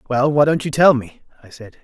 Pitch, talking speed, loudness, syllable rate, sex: 135 Hz, 260 wpm, -16 LUFS, 5.8 syllables/s, male